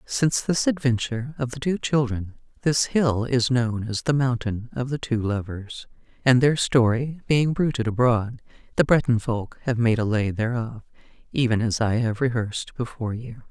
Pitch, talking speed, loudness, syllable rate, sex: 120 Hz, 175 wpm, -23 LUFS, 4.8 syllables/s, female